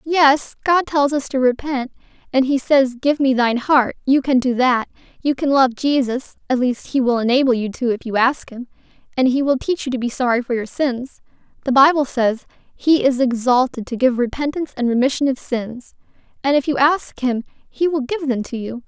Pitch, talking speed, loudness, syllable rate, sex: 260 Hz, 215 wpm, -18 LUFS, 5.2 syllables/s, female